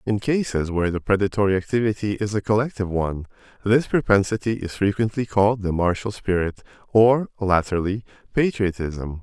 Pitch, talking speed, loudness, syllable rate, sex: 100 Hz, 135 wpm, -22 LUFS, 5.6 syllables/s, male